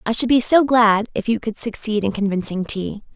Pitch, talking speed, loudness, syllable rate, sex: 220 Hz, 230 wpm, -19 LUFS, 5.2 syllables/s, female